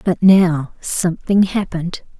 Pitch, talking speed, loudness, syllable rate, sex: 180 Hz, 110 wpm, -16 LUFS, 4.2 syllables/s, female